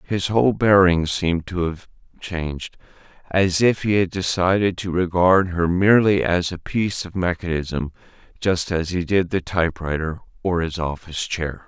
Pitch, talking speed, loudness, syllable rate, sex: 90 Hz, 160 wpm, -20 LUFS, 4.8 syllables/s, male